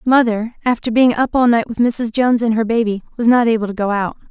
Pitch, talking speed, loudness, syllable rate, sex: 230 Hz, 250 wpm, -16 LUFS, 6.1 syllables/s, female